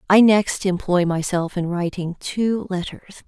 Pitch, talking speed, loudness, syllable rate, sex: 185 Hz, 145 wpm, -20 LUFS, 4.1 syllables/s, female